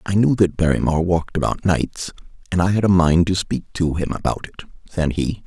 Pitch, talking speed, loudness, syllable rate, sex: 85 Hz, 220 wpm, -19 LUFS, 5.8 syllables/s, male